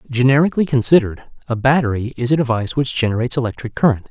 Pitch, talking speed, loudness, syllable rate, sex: 125 Hz, 160 wpm, -17 LUFS, 7.6 syllables/s, male